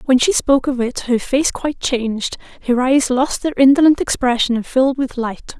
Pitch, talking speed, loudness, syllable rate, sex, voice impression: 260 Hz, 205 wpm, -16 LUFS, 5.3 syllables/s, female, feminine, slightly adult-like, fluent, friendly, slightly elegant, slightly sweet